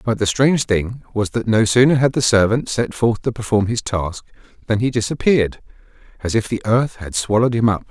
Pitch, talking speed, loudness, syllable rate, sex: 110 Hz, 215 wpm, -18 LUFS, 5.6 syllables/s, male